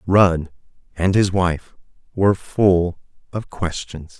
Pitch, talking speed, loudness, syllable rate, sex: 90 Hz, 115 wpm, -20 LUFS, 3.4 syllables/s, male